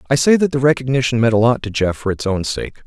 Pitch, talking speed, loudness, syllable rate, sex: 125 Hz, 295 wpm, -17 LUFS, 6.4 syllables/s, male